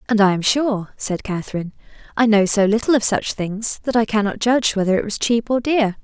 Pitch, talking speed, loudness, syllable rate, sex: 215 Hz, 230 wpm, -19 LUFS, 5.6 syllables/s, female